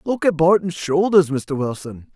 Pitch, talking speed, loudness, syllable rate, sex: 165 Hz, 165 wpm, -18 LUFS, 4.4 syllables/s, male